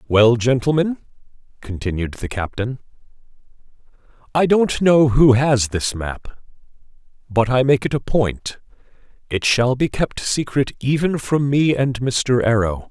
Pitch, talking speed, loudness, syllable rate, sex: 125 Hz, 135 wpm, -18 LUFS, 4.1 syllables/s, male